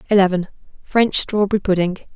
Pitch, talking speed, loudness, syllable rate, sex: 195 Hz, 85 wpm, -18 LUFS, 6.2 syllables/s, female